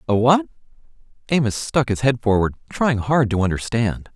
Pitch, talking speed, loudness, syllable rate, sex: 120 Hz, 160 wpm, -20 LUFS, 4.9 syllables/s, male